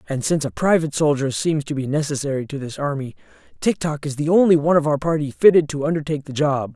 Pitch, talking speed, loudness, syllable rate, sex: 145 Hz, 230 wpm, -20 LUFS, 6.7 syllables/s, male